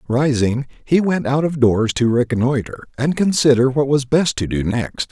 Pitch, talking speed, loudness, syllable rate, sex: 130 Hz, 190 wpm, -17 LUFS, 4.6 syllables/s, male